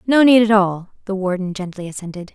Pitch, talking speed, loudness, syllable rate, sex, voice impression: 200 Hz, 205 wpm, -17 LUFS, 5.9 syllables/s, female, feminine, slightly young, slightly fluent, cute, slightly unique, slightly lively